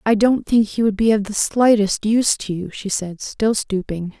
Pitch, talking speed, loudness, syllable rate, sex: 210 Hz, 230 wpm, -18 LUFS, 4.7 syllables/s, female